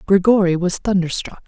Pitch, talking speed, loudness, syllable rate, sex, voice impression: 190 Hz, 120 wpm, -17 LUFS, 5.3 syllables/s, female, feminine, adult-like, slightly relaxed, soft, raspy, intellectual, friendly, reassuring, elegant, kind, modest